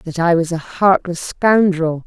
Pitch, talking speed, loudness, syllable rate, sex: 175 Hz, 175 wpm, -16 LUFS, 3.9 syllables/s, female